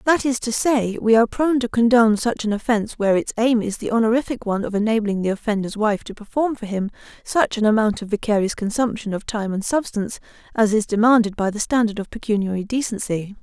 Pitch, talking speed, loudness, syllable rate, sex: 220 Hz, 210 wpm, -20 LUFS, 6.3 syllables/s, female